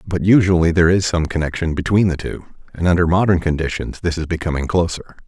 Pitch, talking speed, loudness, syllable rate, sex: 85 Hz, 195 wpm, -17 LUFS, 6.3 syllables/s, male